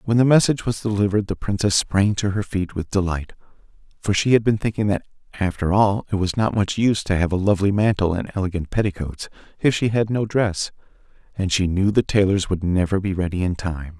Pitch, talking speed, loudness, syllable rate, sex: 100 Hz, 215 wpm, -21 LUFS, 5.9 syllables/s, male